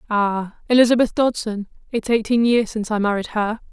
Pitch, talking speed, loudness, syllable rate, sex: 220 Hz, 130 wpm, -19 LUFS, 5.6 syllables/s, female